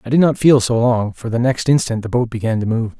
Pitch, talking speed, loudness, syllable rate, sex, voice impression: 120 Hz, 300 wpm, -16 LUFS, 5.9 syllables/s, male, masculine, adult-like, slightly thick, slightly muffled, fluent, slightly cool, sincere